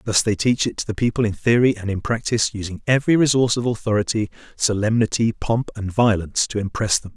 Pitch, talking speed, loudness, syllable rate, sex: 110 Hz, 200 wpm, -20 LUFS, 6.3 syllables/s, male